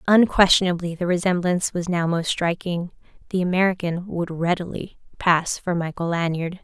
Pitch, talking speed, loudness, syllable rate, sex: 175 Hz, 135 wpm, -22 LUFS, 5.1 syllables/s, female